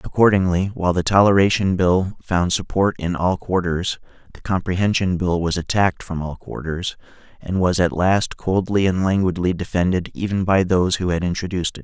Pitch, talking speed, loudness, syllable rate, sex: 90 Hz, 165 wpm, -20 LUFS, 5.4 syllables/s, male